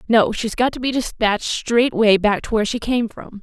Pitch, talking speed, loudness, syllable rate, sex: 225 Hz, 245 wpm, -19 LUFS, 5.2 syllables/s, female